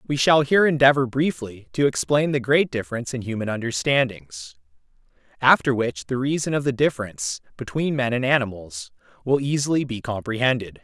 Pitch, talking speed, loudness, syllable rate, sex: 125 Hz, 155 wpm, -22 LUFS, 5.6 syllables/s, male